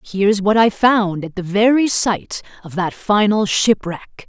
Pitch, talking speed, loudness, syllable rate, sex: 205 Hz, 170 wpm, -16 LUFS, 4.0 syllables/s, female